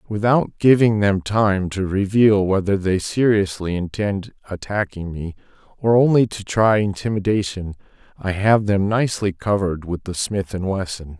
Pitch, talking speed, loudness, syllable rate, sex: 100 Hz, 145 wpm, -19 LUFS, 4.7 syllables/s, male